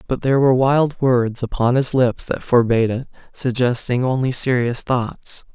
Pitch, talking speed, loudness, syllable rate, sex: 125 Hz, 150 wpm, -18 LUFS, 4.8 syllables/s, male